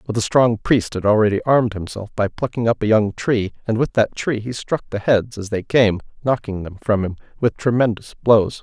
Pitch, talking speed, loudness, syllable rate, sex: 110 Hz, 215 wpm, -19 LUFS, 5.3 syllables/s, male